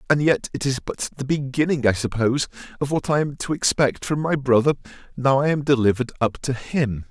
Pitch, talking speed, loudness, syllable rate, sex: 135 Hz, 210 wpm, -22 LUFS, 5.8 syllables/s, male